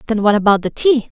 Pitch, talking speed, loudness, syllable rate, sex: 225 Hz, 250 wpm, -15 LUFS, 6.3 syllables/s, female